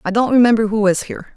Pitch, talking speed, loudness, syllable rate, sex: 220 Hz, 265 wpm, -15 LUFS, 7.2 syllables/s, female